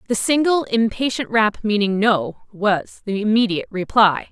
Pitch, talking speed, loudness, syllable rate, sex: 215 Hz, 140 wpm, -19 LUFS, 4.6 syllables/s, female